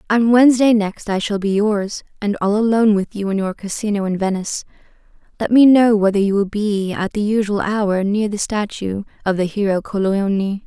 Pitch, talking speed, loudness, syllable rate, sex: 205 Hz, 195 wpm, -17 LUFS, 5.3 syllables/s, female